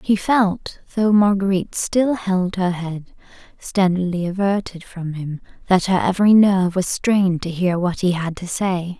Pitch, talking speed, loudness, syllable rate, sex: 185 Hz, 165 wpm, -19 LUFS, 4.5 syllables/s, female